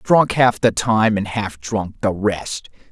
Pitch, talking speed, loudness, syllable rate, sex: 105 Hz, 185 wpm, -18 LUFS, 3.4 syllables/s, male